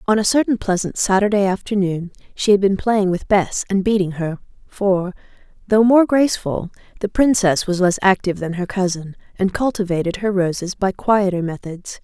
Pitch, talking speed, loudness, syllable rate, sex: 195 Hz, 170 wpm, -18 LUFS, 5.2 syllables/s, female